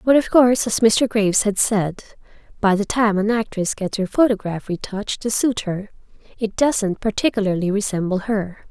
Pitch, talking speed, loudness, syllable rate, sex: 210 Hz, 170 wpm, -19 LUFS, 5.0 syllables/s, female